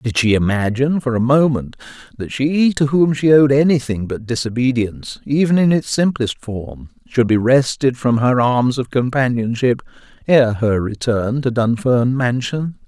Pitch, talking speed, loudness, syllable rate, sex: 125 Hz, 160 wpm, -17 LUFS, 4.5 syllables/s, male